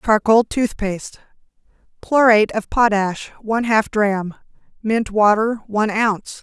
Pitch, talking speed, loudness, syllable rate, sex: 215 Hz, 110 wpm, -17 LUFS, 4.5 syllables/s, female